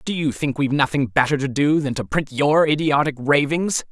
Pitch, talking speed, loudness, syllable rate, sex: 145 Hz, 215 wpm, -19 LUFS, 5.3 syllables/s, male